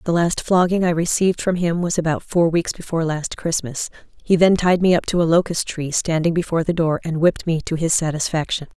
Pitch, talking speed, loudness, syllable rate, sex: 170 Hz, 225 wpm, -19 LUFS, 5.9 syllables/s, female